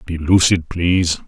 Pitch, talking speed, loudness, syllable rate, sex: 85 Hz, 140 wpm, -16 LUFS, 4.6 syllables/s, male